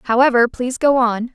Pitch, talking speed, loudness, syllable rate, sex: 245 Hz, 180 wpm, -16 LUFS, 5.3 syllables/s, female